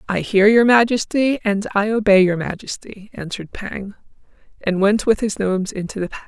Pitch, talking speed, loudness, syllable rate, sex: 205 Hz, 180 wpm, -18 LUFS, 5.6 syllables/s, female